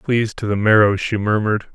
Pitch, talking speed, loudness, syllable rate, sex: 105 Hz, 205 wpm, -17 LUFS, 5.9 syllables/s, male